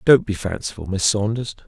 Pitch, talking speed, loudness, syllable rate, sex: 105 Hz, 180 wpm, -21 LUFS, 5.4 syllables/s, male